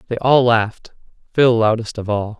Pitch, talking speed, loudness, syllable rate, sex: 115 Hz, 175 wpm, -17 LUFS, 5.0 syllables/s, male